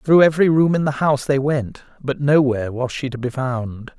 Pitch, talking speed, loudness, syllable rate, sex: 135 Hz, 225 wpm, -19 LUFS, 5.5 syllables/s, male